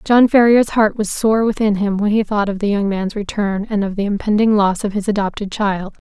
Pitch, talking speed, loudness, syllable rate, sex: 205 Hz, 240 wpm, -17 LUFS, 5.3 syllables/s, female